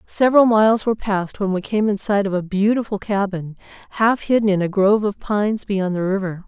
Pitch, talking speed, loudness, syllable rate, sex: 205 Hz, 215 wpm, -19 LUFS, 5.8 syllables/s, female